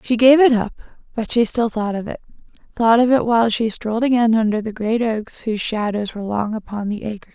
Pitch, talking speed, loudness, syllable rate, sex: 225 Hz, 235 wpm, -18 LUFS, 6.2 syllables/s, female